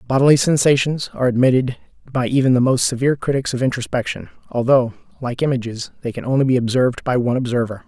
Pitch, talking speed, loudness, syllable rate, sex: 125 Hz, 175 wpm, -18 LUFS, 6.8 syllables/s, male